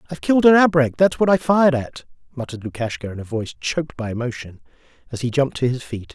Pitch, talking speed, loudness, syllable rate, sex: 135 Hz, 225 wpm, -19 LUFS, 6.9 syllables/s, male